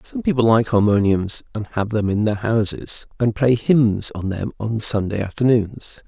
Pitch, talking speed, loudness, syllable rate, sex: 110 Hz, 180 wpm, -19 LUFS, 4.4 syllables/s, male